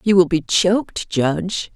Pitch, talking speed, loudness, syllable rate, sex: 175 Hz, 170 wpm, -18 LUFS, 4.2 syllables/s, female